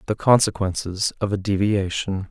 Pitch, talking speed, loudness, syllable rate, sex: 100 Hz, 130 wpm, -21 LUFS, 4.9 syllables/s, male